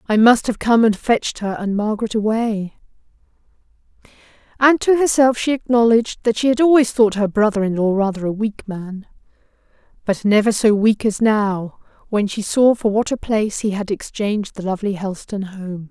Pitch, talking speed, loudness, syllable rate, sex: 215 Hz, 180 wpm, -18 LUFS, 5.3 syllables/s, female